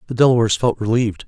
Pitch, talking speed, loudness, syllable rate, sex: 115 Hz, 190 wpm, -17 LUFS, 8.3 syllables/s, male